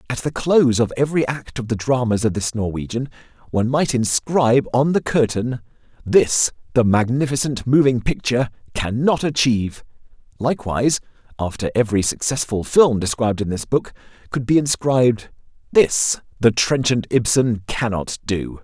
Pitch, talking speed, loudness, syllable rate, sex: 120 Hz, 140 wpm, -19 LUFS, 5.1 syllables/s, male